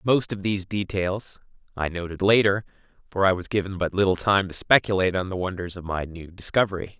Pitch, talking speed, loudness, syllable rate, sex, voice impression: 95 Hz, 195 wpm, -24 LUFS, 5.9 syllables/s, male, masculine, adult-like, slightly middle-aged, thick, slightly tensed, slightly powerful, slightly bright, hard, slightly muffled, fluent, slightly cool, very intellectual, slightly refreshing, very sincere, very calm, slightly mature, slightly friendly, slightly reassuring, wild, slightly intense, slightly sharp